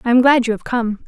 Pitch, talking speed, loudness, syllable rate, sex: 240 Hz, 335 wpm, -16 LUFS, 6.2 syllables/s, female